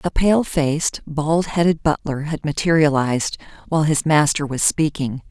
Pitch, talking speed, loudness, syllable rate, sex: 155 Hz, 145 wpm, -19 LUFS, 4.8 syllables/s, female